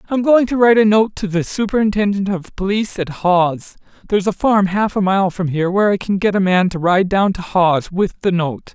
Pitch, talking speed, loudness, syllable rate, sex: 195 Hz, 235 wpm, -16 LUFS, 5.8 syllables/s, male